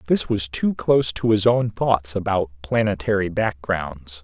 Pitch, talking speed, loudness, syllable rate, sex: 100 Hz, 155 wpm, -21 LUFS, 4.3 syllables/s, male